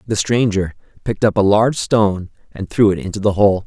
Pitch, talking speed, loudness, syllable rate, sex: 105 Hz, 215 wpm, -16 LUFS, 5.8 syllables/s, male